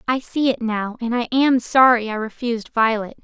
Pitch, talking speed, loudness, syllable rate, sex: 235 Hz, 205 wpm, -19 LUFS, 5.1 syllables/s, female